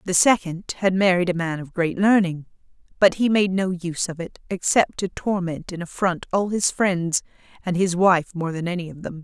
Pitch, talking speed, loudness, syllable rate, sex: 180 Hz, 210 wpm, -22 LUFS, 5.0 syllables/s, female